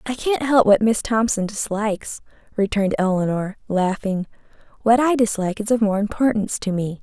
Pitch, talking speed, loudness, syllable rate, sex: 210 Hz, 160 wpm, -20 LUFS, 5.5 syllables/s, female